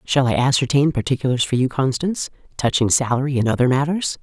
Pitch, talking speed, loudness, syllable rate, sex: 135 Hz, 170 wpm, -19 LUFS, 6.3 syllables/s, female